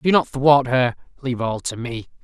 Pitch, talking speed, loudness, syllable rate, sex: 130 Hz, 215 wpm, -20 LUFS, 5.0 syllables/s, male